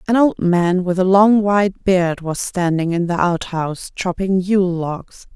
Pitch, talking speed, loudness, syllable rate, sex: 185 Hz, 180 wpm, -17 LUFS, 4.1 syllables/s, female